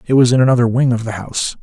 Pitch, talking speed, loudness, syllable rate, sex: 120 Hz, 295 wpm, -15 LUFS, 7.5 syllables/s, male